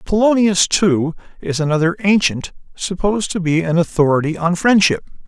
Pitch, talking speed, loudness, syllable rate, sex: 180 Hz, 135 wpm, -16 LUFS, 5.2 syllables/s, male